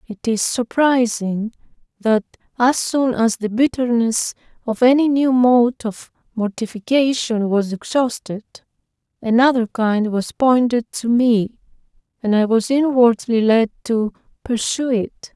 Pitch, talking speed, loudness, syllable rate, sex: 235 Hz, 120 wpm, -18 LUFS, 3.9 syllables/s, female